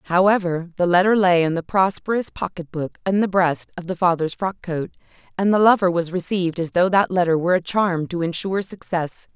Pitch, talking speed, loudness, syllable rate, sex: 180 Hz, 205 wpm, -20 LUFS, 5.5 syllables/s, female